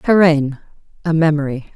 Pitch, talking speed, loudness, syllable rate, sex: 155 Hz, 105 wpm, -16 LUFS, 4.6 syllables/s, female